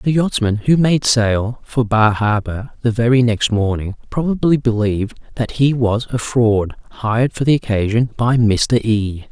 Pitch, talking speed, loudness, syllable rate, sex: 115 Hz, 165 wpm, -17 LUFS, 4.4 syllables/s, male